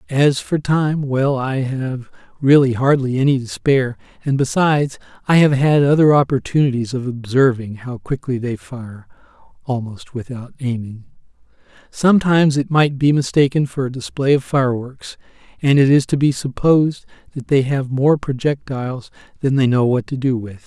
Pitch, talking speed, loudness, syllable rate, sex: 135 Hz, 160 wpm, -17 LUFS, 5.0 syllables/s, male